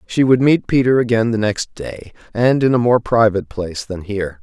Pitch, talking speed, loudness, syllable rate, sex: 115 Hz, 215 wpm, -16 LUFS, 5.4 syllables/s, male